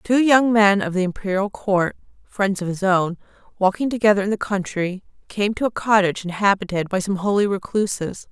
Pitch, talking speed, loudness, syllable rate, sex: 200 Hz, 180 wpm, -20 LUFS, 5.3 syllables/s, female